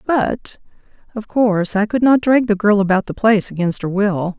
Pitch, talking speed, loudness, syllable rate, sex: 210 Hz, 205 wpm, -16 LUFS, 5.1 syllables/s, female